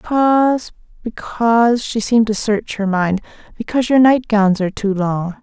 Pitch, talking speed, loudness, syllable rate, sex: 220 Hz, 135 wpm, -16 LUFS, 4.9 syllables/s, female